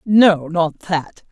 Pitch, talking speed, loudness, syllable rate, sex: 175 Hz, 135 wpm, -17 LUFS, 2.5 syllables/s, female